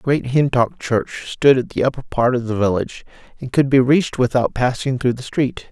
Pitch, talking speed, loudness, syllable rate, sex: 125 Hz, 210 wpm, -18 LUFS, 5.1 syllables/s, male